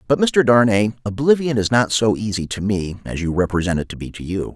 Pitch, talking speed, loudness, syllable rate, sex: 105 Hz, 235 wpm, -19 LUFS, 5.6 syllables/s, male